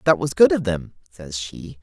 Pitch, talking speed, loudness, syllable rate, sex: 105 Hz, 230 wpm, -20 LUFS, 4.6 syllables/s, male